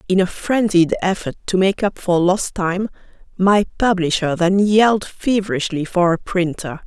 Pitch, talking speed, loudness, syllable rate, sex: 185 Hz, 155 wpm, -18 LUFS, 4.6 syllables/s, female